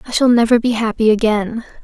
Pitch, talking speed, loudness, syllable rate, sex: 225 Hz, 195 wpm, -15 LUFS, 5.9 syllables/s, female